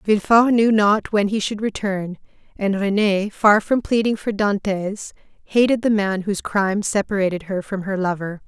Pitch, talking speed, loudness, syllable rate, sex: 205 Hz, 170 wpm, -19 LUFS, 4.7 syllables/s, female